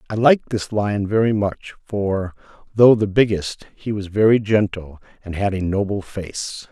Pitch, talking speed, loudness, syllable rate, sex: 105 Hz, 170 wpm, -19 LUFS, 4.4 syllables/s, male